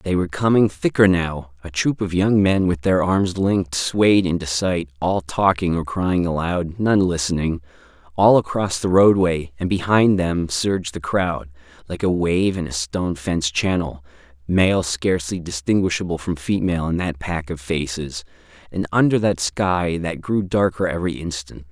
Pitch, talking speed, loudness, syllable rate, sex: 85 Hz, 165 wpm, -20 LUFS, 4.7 syllables/s, male